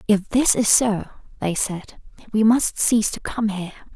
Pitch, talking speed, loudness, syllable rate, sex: 210 Hz, 180 wpm, -20 LUFS, 4.8 syllables/s, female